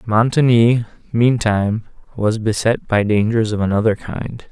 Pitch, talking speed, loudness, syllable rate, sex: 110 Hz, 120 wpm, -17 LUFS, 4.4 syllables/s, male